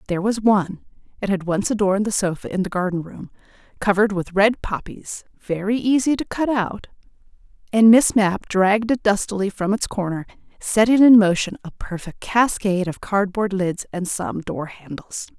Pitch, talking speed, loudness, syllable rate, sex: 200 Hz, 165 wpm, -20 LUFS, 4.8 syllables/s, female